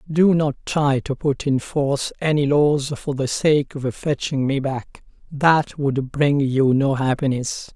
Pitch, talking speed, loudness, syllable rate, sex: 140 Hz, 170 wpm, -20 LUFS, 3.8 syllables/s, male